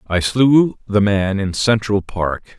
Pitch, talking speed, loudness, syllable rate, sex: 105 Hz, 165 wpm, -17 LUFS, 3.4 syllables/s, male